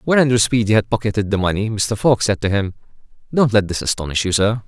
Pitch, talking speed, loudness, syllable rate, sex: 105 Hz, 230 wpm, -18 LUFS, 6.3 syllables/s, male